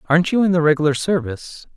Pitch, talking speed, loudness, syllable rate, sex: 160 Hz, 205 wpm, -17 LUFS, 7.3 syllables/s, male